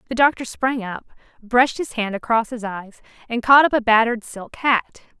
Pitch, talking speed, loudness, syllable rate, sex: 235 Hz, 195 wpm, -19 LUFS, 5.1 syllables/s, female